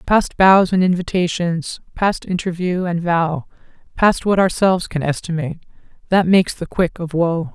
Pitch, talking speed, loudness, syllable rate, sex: 180 Hz, 150 wpm, -18 LUFS, 4.8 syllables/s, female